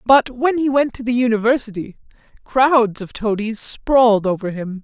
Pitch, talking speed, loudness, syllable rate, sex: 230 Hz, 160 wpm, -17 LUFS, 4.7 syllables/s, male